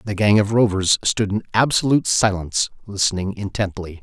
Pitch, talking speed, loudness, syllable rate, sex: 100 Hz, 150 wpm, -19 LUFS, 5.5 syllables/s, male